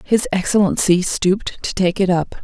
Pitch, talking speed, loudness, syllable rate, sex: 190 Hz, 170 wpm, -17 LUFS, 4.9 syllables/s, female